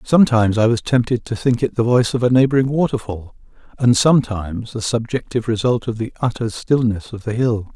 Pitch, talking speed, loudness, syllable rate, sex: 115 Hz, 195 wpm, -18 LUFS, 6.1 syllables/s, male